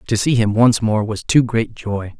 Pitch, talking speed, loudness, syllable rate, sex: 110 Hz, 245 wpm, -17 LUFS, 4.4 syllables/s, male